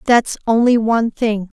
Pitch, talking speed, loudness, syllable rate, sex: 225 Hz, 150 wpm, -16 LUFS, 4.7 syllables/s, female